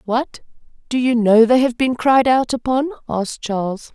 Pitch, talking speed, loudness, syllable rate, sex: 245 Hz, 185 wpm, -17 LUFS, 4.7 syllables/s, female